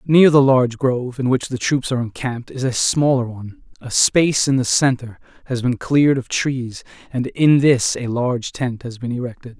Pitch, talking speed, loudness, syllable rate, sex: 130 Hz, 205 wpm, -18 LUFS, 5.3 syllables/s, male